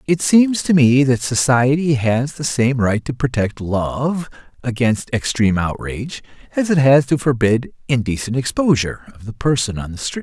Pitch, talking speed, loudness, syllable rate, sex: 130 Hz, 170 wpm, -17 LUFS, 4.8 syllables/s, male